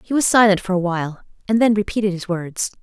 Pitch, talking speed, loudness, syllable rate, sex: 195 Hz, 215 wpm, -18 LUFS, 6.3 syllables/s, female